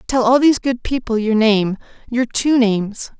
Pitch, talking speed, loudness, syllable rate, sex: 235 Hz, 190 wpm, -17 LUFS, 4.8 syllables/s, female